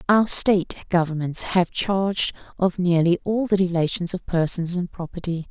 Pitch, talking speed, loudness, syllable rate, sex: 180 Hz, 155 wpm, -22 LUFS, 5.0 syllables/s, female